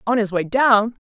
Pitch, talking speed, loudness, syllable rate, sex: 220 Hz, 225 wpm, -18 LUFS, 4.6 syllables/s, female